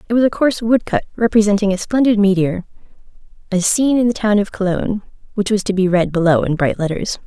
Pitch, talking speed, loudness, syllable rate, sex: 205 Hz, 215 wpm, -16 LUFS, 6.3 syllables/s, female